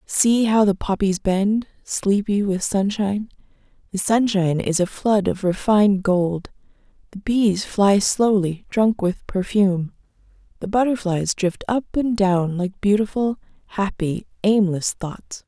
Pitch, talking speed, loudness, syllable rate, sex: 200 Hz, 130 wpm, -20 LUFS, 4.0 syllables/s, female